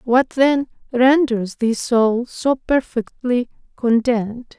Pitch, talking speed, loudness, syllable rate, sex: 245 Hz, 105 wpm, -18 LUFS, 3.1 syllables/s, female